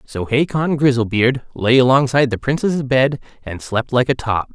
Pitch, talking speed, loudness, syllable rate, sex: 130 Hz, 170 wpm, -17 LUFS, 4.8 syllables/s, male